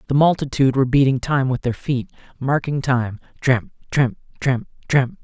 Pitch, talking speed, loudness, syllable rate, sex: 130 Hz, 150 wpm, -20 LUFS, 5.1 syllables/s, male